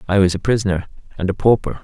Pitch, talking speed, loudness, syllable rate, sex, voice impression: 100 Hz, 230 wpm, -18 LUFS, 7.3 syllables/s, male, very masculine, very adult-like, very thick, relaxed, slightly weak, slightly dark, slightly soft, muffled, fluent, raspy, cool, very intellectual, slightly refreshing, sincere, very calm, slightly mature, very friendly, very reassuring, very unique, elegant, wild, very sweet, slightly lively, very kind, very modest